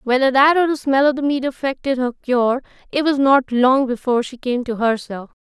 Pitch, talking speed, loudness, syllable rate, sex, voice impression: 260 Hz, 220 wpm, -18 LUFS, 5.3 syllables/s, female, feminine, adult-like, tensed, powerful, clear, slightly intellectual, slightly friendly, lively, slightly intense, sharp